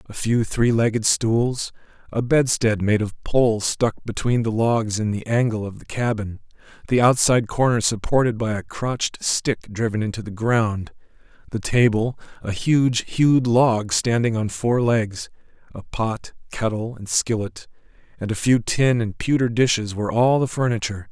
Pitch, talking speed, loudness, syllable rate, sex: 115 Hz, 165 wpm, -21 LUFS, 4.6 syllables/s, male